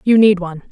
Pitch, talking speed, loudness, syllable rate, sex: 195 Hz, 255 wpm, -14 LUFS, 7.1 syllables/s, female